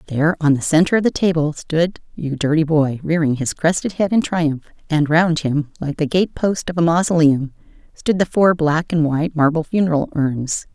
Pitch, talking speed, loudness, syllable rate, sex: 160 Hz, 200 wpm, -18 LUFS, 5.1 syllables/s, female